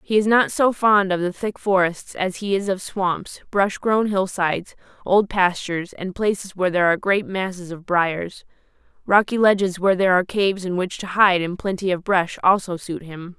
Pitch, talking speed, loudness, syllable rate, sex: 190 Hz, 200 wpm, -20 LUFS, 5.1 syllables/s, female